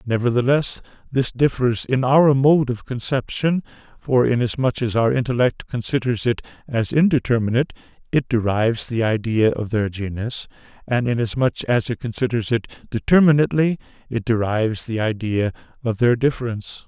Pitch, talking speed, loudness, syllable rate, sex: 120 Hz, 135 wpm, -20 LUFS, 5.1 syllables/s, male